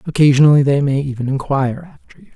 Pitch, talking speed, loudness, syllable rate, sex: 140 Hz, 180 wpm, -15 LUFS, 6.9 syllables/s, male